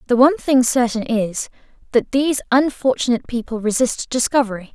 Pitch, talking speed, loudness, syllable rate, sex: 245 Hz, 140 wpm, -18 LUFS, 5.7 syllables/s, female